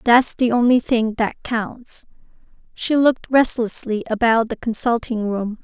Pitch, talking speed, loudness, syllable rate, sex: 235 Hz, 140 wpm, -19 LUFS, 4.2 syllables/s, female